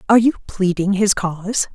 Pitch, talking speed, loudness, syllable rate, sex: 200 Hz, 170 wpm, -18 LUFS, 5.8 syllables/s, female